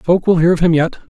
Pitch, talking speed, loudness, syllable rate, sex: 170 Hz, 300 wpm, -14 LUFS, 5.9 syllables/s, male